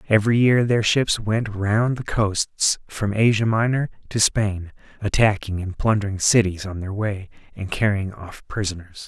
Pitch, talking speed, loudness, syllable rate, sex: 105 Hz, 160 wpm, -21 LUFS, 4.4 syllables/s, male